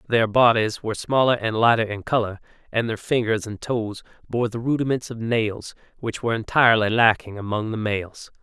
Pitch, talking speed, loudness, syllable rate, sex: 115 Hz, 180 wpm, -22 LUFS, 5.3 syllables/s, male